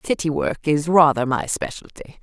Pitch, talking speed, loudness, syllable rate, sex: 135 Hz, 160 wpm, -20 LUFS, 4.8 syllables/s, female